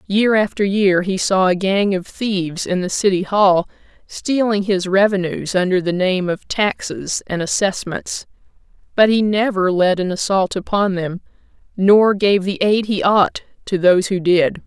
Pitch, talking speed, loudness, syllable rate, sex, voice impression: 195 Hz, 170 wpm, -17 LUFS, 4.3 syllables/s, female, very feminine, slightly gender-neutral, very adult-like, slightly middle-aged, slightly thin, very tensed, powerful, bright, hard, very clear, fluent, cool, very intellectual, refreshing, very sincere, very calm, slightly friendly, reassuring, very unique, elegant, slightly sweet, slightly lively, strict, slightly intense, sharp, light